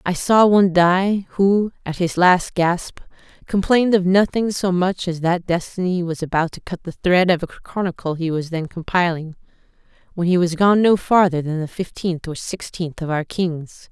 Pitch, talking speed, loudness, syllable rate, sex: 180 Hz, 190 wpm, -19 LUFS, 4.7 syllables/s, female